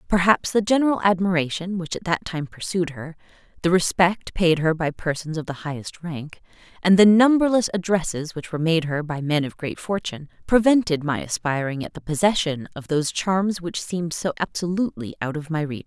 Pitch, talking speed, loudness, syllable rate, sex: 170 Hz, 190 wpm, -22 LUFS, 5.5 syllables/s, female